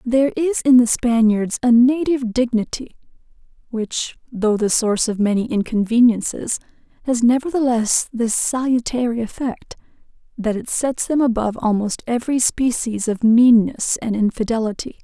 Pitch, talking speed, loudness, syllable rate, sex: 235 Hz, 130 wpm, -18 LUFS, 4.9 syllables/s, female